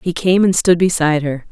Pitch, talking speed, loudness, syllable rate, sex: 170 Hz, 240 wpm, -14 LUFS, 5.5 syllables/s, female